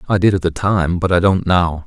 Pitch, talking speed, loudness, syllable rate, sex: 90 Hz, 290 wpm, -16 LUFS, 5.3 syllables/s, male